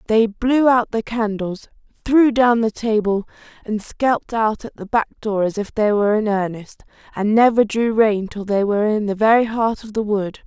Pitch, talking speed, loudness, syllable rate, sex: 215 Hz, 205 wpm, -18 LUFS, 4.8 syllables/s, female